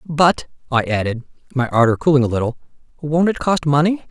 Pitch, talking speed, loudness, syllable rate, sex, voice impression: 145 Hz, 175 wpm, -18 LUFS, 5.7 syllables/s, male, masculine, middle-aged, tensed, powerful, muffled, very fluent, slightly raspy, intellectual, friendly, wild, lively, slightly intense